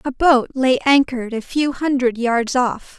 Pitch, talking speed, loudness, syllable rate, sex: 255 Hz, 180 wpm, -18 LUFS, 4.2 syllables/s, female